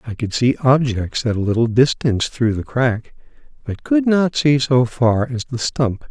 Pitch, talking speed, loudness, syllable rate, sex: 125 Hz, 195 wpm, -18 LUFS, 4.4 syllables/s, male